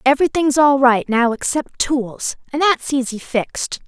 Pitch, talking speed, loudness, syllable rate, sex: 265 Hz, 155 wpm, -17 LUFS, 4.5 syllables/s, female